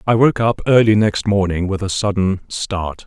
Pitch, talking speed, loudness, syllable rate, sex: 100 Hz, 195 wpm, -17 LUFS, 4.6 syllables/s, male